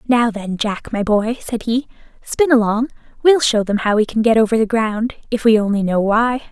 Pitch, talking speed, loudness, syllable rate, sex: 225 Hz, 220 wpm, -17 LUFS, 4.9 syllables/s, female